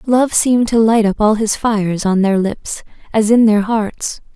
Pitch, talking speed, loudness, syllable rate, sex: 215 Hz, 205 wpm, -14 LUFS, 4.4 syllables/s, female